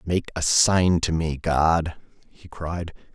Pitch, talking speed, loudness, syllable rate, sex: 80 Hz, 155 wpm, -22 LUFS, 3.3 syllables/s, male